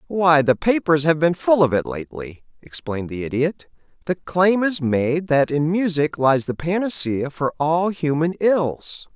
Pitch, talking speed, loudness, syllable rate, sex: 155 Hz, 170 wpm, -20 LUFS, 4.4 syllables/s, male